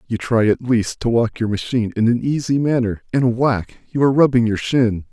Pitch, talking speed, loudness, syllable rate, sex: 120 Hz, 210 wpm, -18 LUFS, 5.5 syllables/s, male